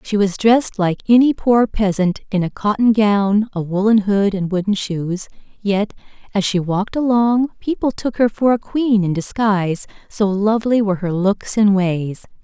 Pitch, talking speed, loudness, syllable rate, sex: 205 Hz, 180 wpm, -17 LUFS, 4.7 syllables/s, female